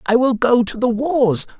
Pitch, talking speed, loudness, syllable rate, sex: 240 Hz, 225 wpm, -17 LUFS, 4.4 syllables/s, male